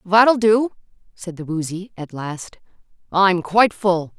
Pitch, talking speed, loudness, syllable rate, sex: 185 Hz, 145 wpm, -19 LUFS, 3.9 syllables/s, female